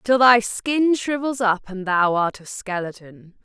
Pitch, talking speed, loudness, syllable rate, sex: 215 Hz, 175 wpm, -20 LUFS, 4.0 syllables/s, female